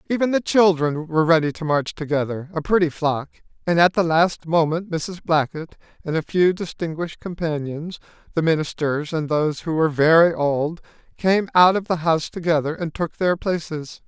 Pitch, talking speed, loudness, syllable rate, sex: 165 Hz, 175 wpm, -21 LUFS, 5.2 syllables/s, male